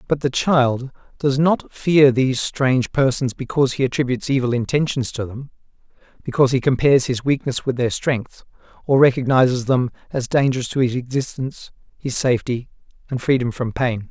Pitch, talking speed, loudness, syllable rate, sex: 130 Hz, 160 wpm, -19 LUFS, 5.5 syllables/s, male